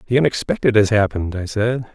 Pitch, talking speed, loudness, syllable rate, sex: 110 Hz, 185 wpm, -18 LUFS, 6.3 syllables/s, male